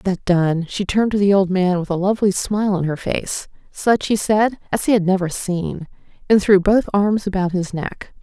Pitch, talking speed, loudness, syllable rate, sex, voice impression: 195 Hz, 205 wpm, -18 LUFS, 4.9 syllables/s, female, very feminine, adult-like, slightly middle-aged, slightly thin, slightly relaxed, slightly weak, bright, very soft, clear, fluent, slightly raspy, cute, slightly cool, very intellectual, refreshing, very sincere, very calm, very friendly, very reassuring, very unique, very elegant, slightly wild, very sweet, lively, very kind, slightly intense, slightly modest, slightly light